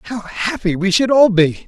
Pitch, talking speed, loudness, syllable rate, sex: 205 Hz, 215 wpm, -15 LUFS, 4.8 syllables/s, male